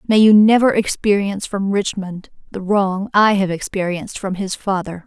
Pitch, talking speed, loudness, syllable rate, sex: 195 Hz, 165 wpm, -17 LUFS, 4.9 syllables/s, female